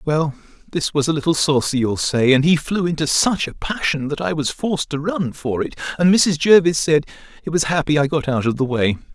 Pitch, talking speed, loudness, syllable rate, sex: 155 Hz, 230 wpm, -18 LUFS, 5.5 syllables/s, male